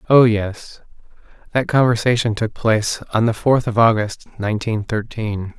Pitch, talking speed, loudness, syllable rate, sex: 110 Hz, 140 wpm, -18 LUFS, 4.7 syllables/s, male